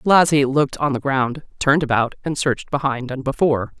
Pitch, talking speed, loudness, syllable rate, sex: 140 Hz, 190 wpm, -19 LUFS, 5.7 syllables/s, female